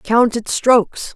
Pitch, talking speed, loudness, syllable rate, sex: 235 Hz, 155 wpm, -15 LUFS, 3.6 syllables/s, female